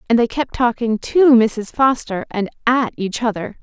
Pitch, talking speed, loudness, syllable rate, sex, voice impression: 235 Hz, 180 wpm, -17 LUFS, 4.3 syllables/s, female, feminine, adult-like, fluent, slightly calm, friendly, slightly sweet, kind